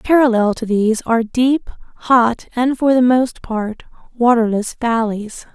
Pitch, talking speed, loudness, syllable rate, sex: 235 Hz, 140 wpm, -16 LUFS, 4.3 syllables/s, female